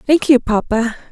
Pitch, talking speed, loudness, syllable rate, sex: 250 Hz, 160 wpm, -15 LUFS, 4.7 syllables/s, female